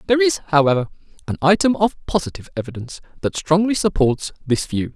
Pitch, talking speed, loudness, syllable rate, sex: 170 Hz, 160 wpm, -19 LUFS, 6.4 syllables/s, male